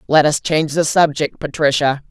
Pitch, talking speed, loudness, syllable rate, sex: 150 Hz, 170 wpm, -16 LUFS, 5.3 syllables/s, female